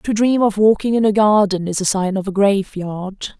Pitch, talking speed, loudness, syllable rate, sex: 200 Hz, 230 wpm, -16 LUFS, 4.8 syllables/s, female